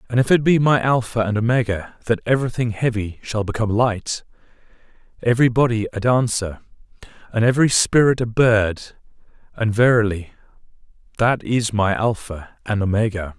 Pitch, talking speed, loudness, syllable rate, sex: 110 Hz, 140 wpm, -19 LUFS, 5.3 syllables/s, male